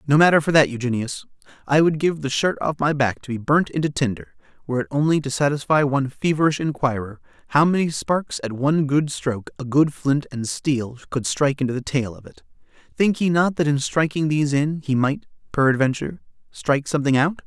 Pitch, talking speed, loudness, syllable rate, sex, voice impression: 140 Hz, 200 wpm, -21 LUFS, 5.8 syllables/s, male, masculine, adult-like, slightly thick, tensed, slightly powerful, bright, hard, clear, fluent, slightly raspy, cool, intellectual, very refreshing, very sincere, slightly calm, friendly, reassuring, very unique, slightly elegant, wild, slightly sweet, very lively, kind, slightly intense